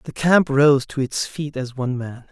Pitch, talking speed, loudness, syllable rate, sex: 140 Hz, 235 wpm, -20 LUFS, 4.5 syllables/s, male